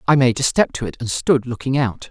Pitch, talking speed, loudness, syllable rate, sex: 125 Hz, 285 wpm, -19 LUFS, 5.7 syllables/s, male